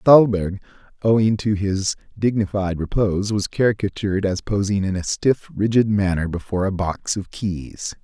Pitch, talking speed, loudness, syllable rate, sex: 100 Hz, 150 wpm, -21 LUFS, 4.9 syllables/s, male